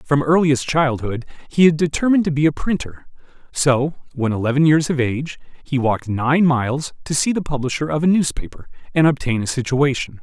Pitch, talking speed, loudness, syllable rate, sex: 140 Hz, 180 wpm, -18 LUFS, 5.7 syllables/s, male